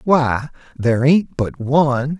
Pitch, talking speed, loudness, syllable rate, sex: 140 Hz, 135 wpm, -17 LUFS, 3.8 syllables/s, male